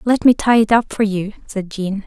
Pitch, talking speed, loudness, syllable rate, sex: 210 Hz, 260 wpm, -17 LUFS, 4.9 syllables/s, female